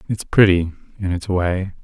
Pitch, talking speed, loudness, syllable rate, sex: 95 Hz, 165 wpm, -18 LUFS, 4.6 syllables/s, male